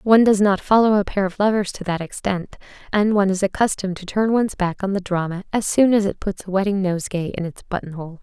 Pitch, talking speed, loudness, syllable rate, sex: 195 Hz, 240 wpm, -20 LUFS, 6.3 syllables/s, female